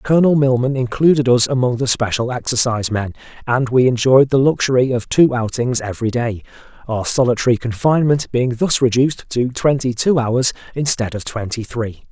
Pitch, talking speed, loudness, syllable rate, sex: 125 Hz, 165 wpm, -17 LUFS, 5.4 syllables/s, male